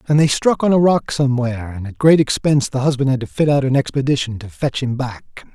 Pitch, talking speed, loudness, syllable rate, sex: 135 Hz, 250 wpm, -17 LUFS, 6.0 syllables/s, male